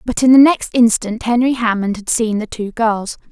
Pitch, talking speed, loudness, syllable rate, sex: 230 Hz, 220 wpm, -15 LUFS, 4.8 syllables/s, female